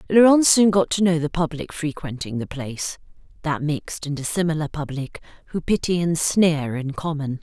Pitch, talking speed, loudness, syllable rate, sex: 160 Hz, 170 wpm, -22 LUFS, 5.2 syllables/s, female